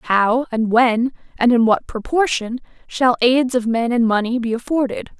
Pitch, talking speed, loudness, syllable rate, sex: 240 Hz, 175 wpm, -18 LUFS, 4.5 syllables/s, female